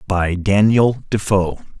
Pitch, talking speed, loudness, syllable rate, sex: 100 Hz, 100 wpm, -17 LUFS, 3.6 syllables/s, male